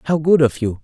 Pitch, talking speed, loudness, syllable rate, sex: 140 Hz, 290 wpm, -16 LUFS, 6.3 syllables/s, male